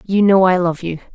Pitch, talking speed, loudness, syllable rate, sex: 185 Hz, 265 wpm, -15 LUFS, 5.7 syllables/s, female